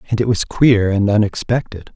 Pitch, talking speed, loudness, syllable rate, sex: 105 Hz, 185 wpm, -16 LUFS, 5.2 syllables/s, male